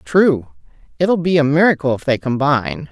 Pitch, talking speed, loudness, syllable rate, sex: 155 Hz, 165 wpm, -16 LUFS, 5.1 syllables/s, female